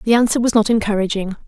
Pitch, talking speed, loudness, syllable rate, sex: 215 Hz, 205 wpm, -17 LUFS, 6.6 syllables/s, female